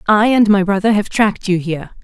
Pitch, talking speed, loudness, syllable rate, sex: 200 Hz, 235 wpm, -14 LUFS, 6.2 syllables/s, female